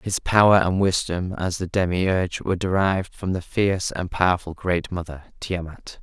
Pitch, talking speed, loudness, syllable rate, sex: 90 Hz, 170 wpm, -22 LUFS, 4.9 syllables/s, male